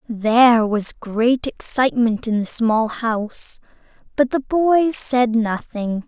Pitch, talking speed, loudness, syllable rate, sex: 235 Hz, 130 wpm, -18 LUFS, 3.6 syllables/s, female